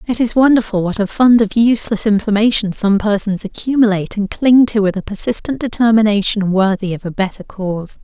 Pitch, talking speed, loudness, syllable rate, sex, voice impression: 210 Hz, 180 wpm, -15 LUFS, 5.7 syllables/s, female, feminine, adult-like, fluent, calm, slightly elegant, slightly modest